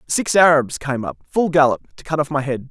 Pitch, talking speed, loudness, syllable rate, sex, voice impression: 145 Hz, 245 wpm, -18 LUFS, 5.6 syllables/s, male, very masculine, young, adult-like, slightly thick, tensed, slightly powerful, very bright, slightly hard, very clear, slightly halting, cool, slightly intellectual, very refreshing, sincere, calm, very friendly, lively, slightly kind, slightly light